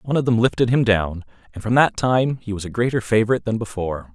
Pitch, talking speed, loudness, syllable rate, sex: 110 Hz, 245 wpm, -20 LUFS, 6.6 syllables/s, male